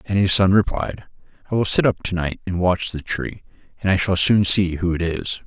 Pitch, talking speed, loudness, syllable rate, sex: 95 Hz, 240 wpm, -20 LUFS, 5.2 syllables/s, male